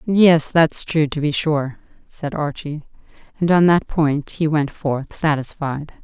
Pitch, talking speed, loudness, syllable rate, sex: 150 Hz, 160 wpm, -19 LUFS, 3.8 syllables/s, female